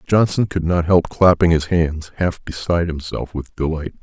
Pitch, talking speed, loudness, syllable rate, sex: 85 Hz, 180 wpm, -18 LUFS, 4.8 syllables/s, male